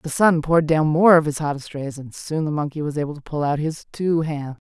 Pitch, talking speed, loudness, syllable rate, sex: 155 Hz, 270 wpm, -21 LUFS, 5.5 syllables/s, female